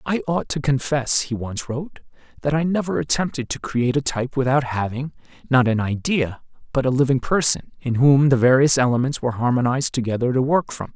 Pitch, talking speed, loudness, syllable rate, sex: 135 Hz, 190 wpm, -20 LUFS, 5.8 syllables/s, male